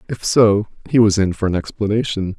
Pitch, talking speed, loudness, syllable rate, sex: 100 Hz, 200 wpm, -17 LUFS, 5.6 syllables/s, male